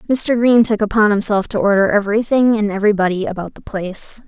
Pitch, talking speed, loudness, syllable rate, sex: 210 Hz, 185 wpm, -15 LUFS, 6.2 syllables/s, female